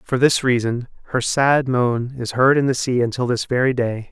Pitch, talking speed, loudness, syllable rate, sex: 125 Hz, 220 wpm, -19 LUFS, 4.8 syllables/s, male